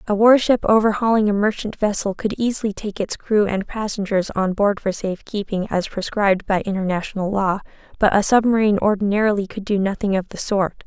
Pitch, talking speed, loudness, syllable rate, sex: 205 Hz, 180 wpm, -20 LUFS, 5.8 syllables/s, female